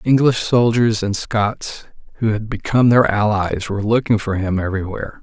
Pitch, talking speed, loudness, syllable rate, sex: 110 Hz, 160 wpm, -18 LUFS, 5.2 syllables/s, male